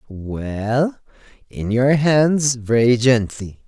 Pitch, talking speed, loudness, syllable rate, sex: 125 Hz, 80 wpm, -18 LUFS, 2.7 syllables/s, male